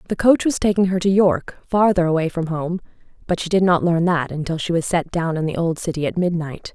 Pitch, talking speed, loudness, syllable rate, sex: 175 Hz, 250 wpm, -20 LUFS, 5.6 syllables/s, female